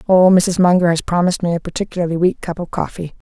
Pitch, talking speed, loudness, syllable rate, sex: 175 Hz, 215 wpm, -16 LUFS, 6.7 syllables/s, female